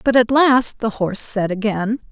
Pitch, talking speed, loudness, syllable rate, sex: 225 Hz, 200 wpm, -17 LUFS, 4.7 syllables/s, female